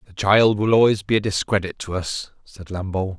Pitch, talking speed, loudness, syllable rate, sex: 100 Hz, 205 wpm, -20 LUFS, 5.5 syllables/s, male